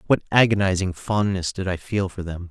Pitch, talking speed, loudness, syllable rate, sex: 95 Hz, 190 wpm, -22 LUFS, 5.3 syllables/s, male